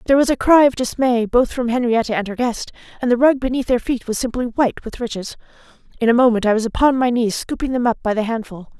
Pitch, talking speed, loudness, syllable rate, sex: 240 Hz, 250 wpm, -18 LUFS, 6.5 syllables/s, female